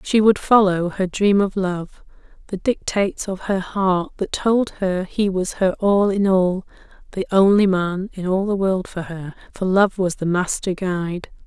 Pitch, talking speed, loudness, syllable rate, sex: 190 Hz, 190 wpm, -20 LUFS, 4.2 syllables/s, female